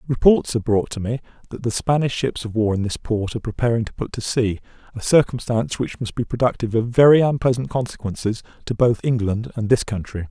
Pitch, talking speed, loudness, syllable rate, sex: 115 Hz, 210 wpm, -21 LUFS, 6.1 syllables/s, male